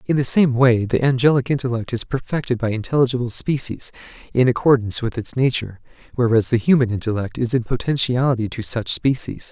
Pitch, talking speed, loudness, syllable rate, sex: 125 Hz, 170 wpm, -19 LUFS, 6.0 syllables/s, male